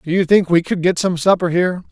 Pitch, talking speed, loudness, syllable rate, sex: 180 Hz, 280 wpm, -16 LUFS, 6.3 syllables/s, male